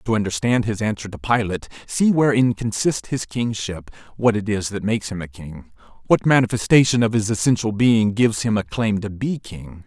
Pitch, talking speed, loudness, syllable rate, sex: 110 Hz, 195 wpm, -20 LUFS, 5.4 syllables/s, male